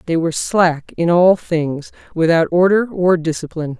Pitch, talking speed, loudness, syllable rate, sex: 170 Hz, 160 wpm, -16 LUFS, 4.8 syllables/s, female